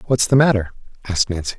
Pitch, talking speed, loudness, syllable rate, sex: 110 Hz, 190 wpm, -18 LUFS, 7.2 syllables/s, male